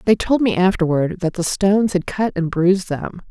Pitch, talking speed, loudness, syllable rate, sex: 185 Hz, 220 wpm, -18 LUFS, 5.1 syllables/s, female